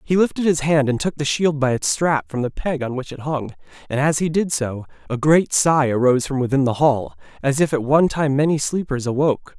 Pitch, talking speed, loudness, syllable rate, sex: 145 Hz, 245 wpm, -19 LUFS, 5.6 syllables/s, male